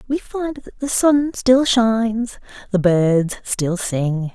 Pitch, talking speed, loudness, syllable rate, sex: 225 Hz, 150 wpm, -18 LUFS, 3.2 syllables/s, female